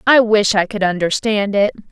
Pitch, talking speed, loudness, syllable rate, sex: 205 Hz, 190 wpm, -15 LUFS, 4.9 syllables/s, female